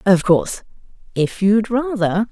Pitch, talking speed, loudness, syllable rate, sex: 205 Hz, 130 wpm, -18 LUFS, 4.2 syllables/s, female